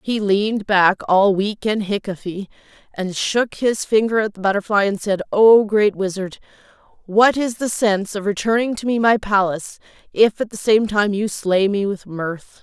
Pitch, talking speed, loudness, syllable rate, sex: 205 Hz, 185 wpm, -18 LUFS, 4.7 syllables/s, female